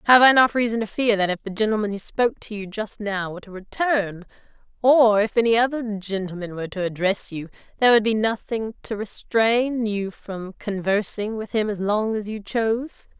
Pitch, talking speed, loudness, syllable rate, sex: 215 Hz, 200 wpm, -22 LUFS, 5.2 syllables/s, female